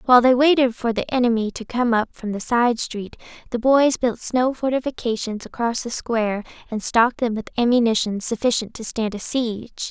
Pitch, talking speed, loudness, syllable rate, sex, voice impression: 235 Hz, 190 wpm, -21 LUFS, 5.3 syllables/s, female, very feminine, very young, very thin, very tensed, powerful, very bright, very soft, very clear, very fluent, very cute, intellectual, very refreshing, sincere, calm, very friendly, very reassuring, very unique, very elegant, very sweet, lively, very kind, modest